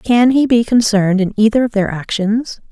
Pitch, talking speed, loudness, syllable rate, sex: 220 Hz, 200 wpm, -14 LUFS, 5.0 syllables/s, female